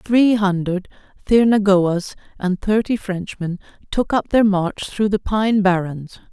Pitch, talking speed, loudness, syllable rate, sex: 200 Hz, 135 wpm, -19 LUFS, 3.8 syllables/s, female